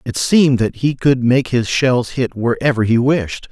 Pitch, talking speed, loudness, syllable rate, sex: 125 Hz, 205 wpm, -15 LUFS, 4.4 syllables/s, male